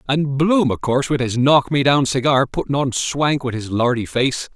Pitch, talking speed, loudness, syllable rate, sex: 135 Hz, 200 wpm, -18 LUFS, 4.8 syllables/s, male